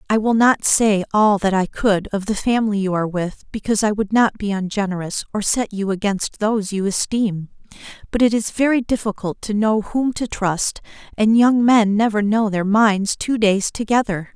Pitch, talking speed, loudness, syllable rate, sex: 210 Hz, 195 wpm, -18 LUFS, 4.9 syllables/s, female